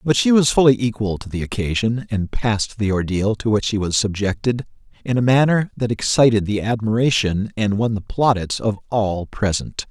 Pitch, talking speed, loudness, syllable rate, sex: 110 Hz, 190 wpm, -19 LUFS, 5.1 syllables/s, male